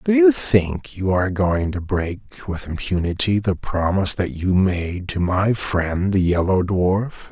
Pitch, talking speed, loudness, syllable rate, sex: 90 Hz, 170 wpm, -20 LUFS, 4.0 syllables/s, male